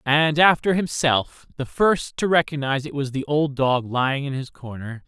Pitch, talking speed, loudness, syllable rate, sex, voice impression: 140 Hz, 190 wpm, -21 LUFS, 4.7 syllables/s, male, very masculine, middle-aged, very thick, tensed, slightly powerful, bright, slightly soft, clear, fluent, slightly raspy, cool, intellectual, very refreshing, sincere, calm, mature, friendly, reassuring, unique, slightly elegant, slightly wild, sweet, lively, kind, slightly modest